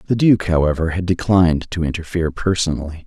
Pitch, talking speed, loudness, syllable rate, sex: 85 Hz, 155 wpm, -18 LUFS, 6.2 syllables/s, male